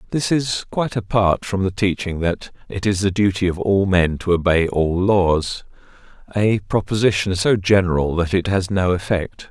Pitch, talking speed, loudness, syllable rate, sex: 95 Hz, 175 wpm, -19 LUFS, 4.7 syllables/s, male